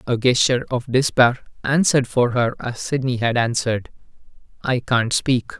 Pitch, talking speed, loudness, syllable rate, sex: 125 Hz, 150 wpm, -20 LUFS, 5.1 syllables/s, male